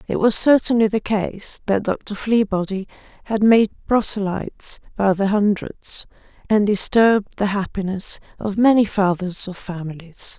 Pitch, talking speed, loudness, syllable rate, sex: 205 Hz, 135 wpm, -20 LUFS, 4.6 syllables/s, female